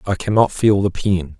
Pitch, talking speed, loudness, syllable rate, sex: 95 Hz, 215 wpm, -17 LUFS, 4.8 syllables/s, male